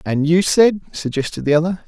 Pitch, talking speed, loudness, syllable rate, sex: 165 Hz, 190 wpm, -17 LUFS, 5.4 syllables/s, male